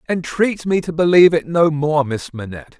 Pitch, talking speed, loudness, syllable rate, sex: 160 Hz, 195 wpm, -16 LUFS, 5.4 syllables/s, male